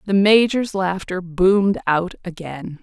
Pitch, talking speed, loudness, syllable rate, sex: 185 Hz, 130 wpm, -18 LUFS, 4.0 syllables/s, female